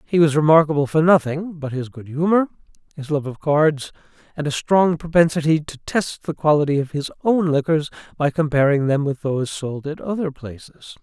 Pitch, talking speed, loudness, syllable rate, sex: 150 Hz, 185 wpm, -20 LUFS, 5.3 syllables/s, male